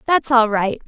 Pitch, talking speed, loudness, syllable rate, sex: 240 Hz, 205 wpm, -16 LUFS, 4.4 syllables/s, female